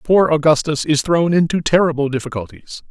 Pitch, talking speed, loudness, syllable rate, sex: 155 Hz, 145 wpm, -16 LUFS, 5.4 syllables/s, male